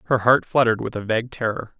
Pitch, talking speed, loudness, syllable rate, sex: 115 Hz, 235 wpm, -21 LUFS, 7.0 syllables/s, male